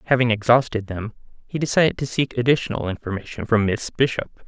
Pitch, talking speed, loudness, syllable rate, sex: 115 Hz, 160 wpm, -21 LUFS, 6.3 syllables/s, male